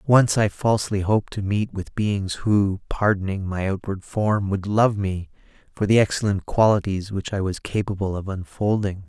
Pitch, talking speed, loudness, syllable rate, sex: 100 Hz, 170 wpm, -22 LUFS, 4.7 syllables/s, male